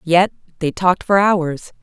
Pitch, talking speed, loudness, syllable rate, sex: 175 Hz, 165 wpm, -17 LUFS, 4.4 syllables/s, female